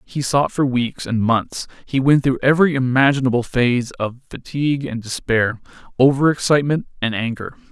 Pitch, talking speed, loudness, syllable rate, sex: 130 Hz, 155 wpm, -18 LUFS, 5.3 syllables/s, male